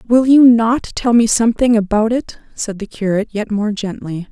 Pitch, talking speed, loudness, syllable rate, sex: 220 Hz, 195 wpm, -15 LUFS, 5.2 syllables/s, female